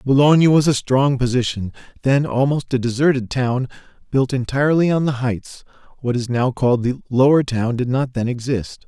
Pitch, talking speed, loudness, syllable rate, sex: 130 Hz, 175 wpm, -18 LUFS, 5.2 syllables/s, male